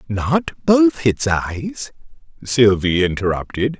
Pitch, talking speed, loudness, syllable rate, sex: 125 Hz, 95 wpm, -18 LUFS, 3.3 syllables/s, male